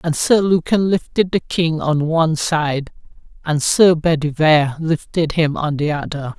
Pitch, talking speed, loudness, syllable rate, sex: 160 Hz, 160 wpm, -17 LUFS, 4.4 syllables/s, female